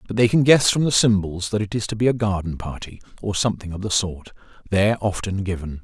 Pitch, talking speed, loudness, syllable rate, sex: 100 Hz, 235 wpm, -21 LUFS, 6.1 syllables/s, male